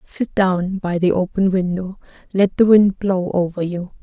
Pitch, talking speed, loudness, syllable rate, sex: 185 Hz, 180 wpm, -18 LUFS, 4.3 syllables/s, female